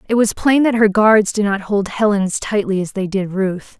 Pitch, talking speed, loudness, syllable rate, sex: 205 Hz, 255 wpm, -16 LUFS, 5.0 syllables/s, female